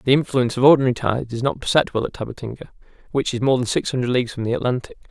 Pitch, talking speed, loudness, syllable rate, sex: 125 Hz, 235 wpm, -20 LUFS, 8.0 syllables/s, male